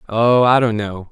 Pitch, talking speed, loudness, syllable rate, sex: 115 Hz, 215 wpm, -15 LUFS, 4.3 syllables/s, male